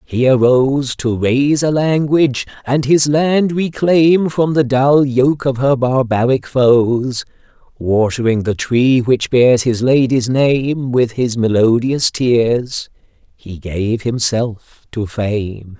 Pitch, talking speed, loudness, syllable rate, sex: 125 Hz, 135 wpm, -14 LUFS, 3.4 syllables/s, male